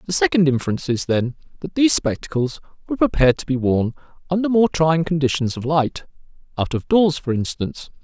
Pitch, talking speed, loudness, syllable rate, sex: 150 Hz, 170 wpm, -20 LUFS, 6.1 syllables/s, male